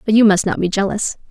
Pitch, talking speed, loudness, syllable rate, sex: 205 Hz, 275 wpm, -16 LUFS, 6.4 syllables/s, female